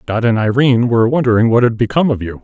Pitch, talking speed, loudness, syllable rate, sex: 120 Hz, 245 wpm, -13 LUFS, 7.4 syllables/s, male